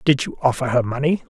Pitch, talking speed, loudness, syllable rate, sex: 135 Hz, 225 wpm, -20 LUFS, 6.0 syllables/s, male